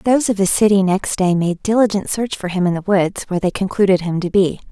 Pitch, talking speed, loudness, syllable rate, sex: 190 Hz, 255 wpm, -17 LUFS, 5.9 syllables/s, female